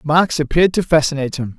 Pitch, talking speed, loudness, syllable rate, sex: 150 Hz, 190 wpm, -16 LUFS, 7.4 syllables/s, male